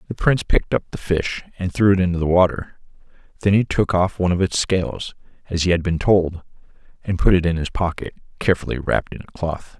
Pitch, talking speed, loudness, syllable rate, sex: 90 Hz, 220 wpm, -20 LUFS, 6.3 syllables/s, male